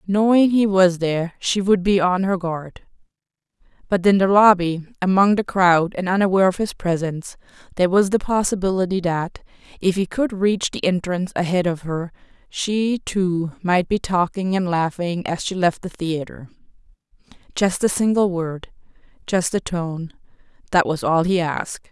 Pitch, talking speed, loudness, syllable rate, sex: 185 Hz, 160 wpm, -20 LUFS, 4.8 syllables/s, female